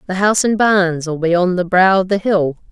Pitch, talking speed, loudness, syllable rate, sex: 185 Hz, 245 wpm, -15 LUFS, 4.9 syllables/s, female